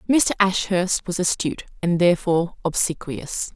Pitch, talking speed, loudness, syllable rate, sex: 180 Hz, 120 wpm, -21 LUFS, 5.0 syllables/s, female